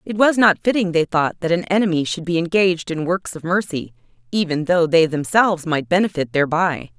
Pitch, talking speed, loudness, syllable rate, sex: 170 Hz, 195 wpm, -18 LUFS, 5.6 syllables/s, female